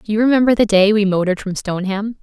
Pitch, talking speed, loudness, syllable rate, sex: 205 Hz, 240 wpm, -16 LUFS, 6.9 syllables/s, female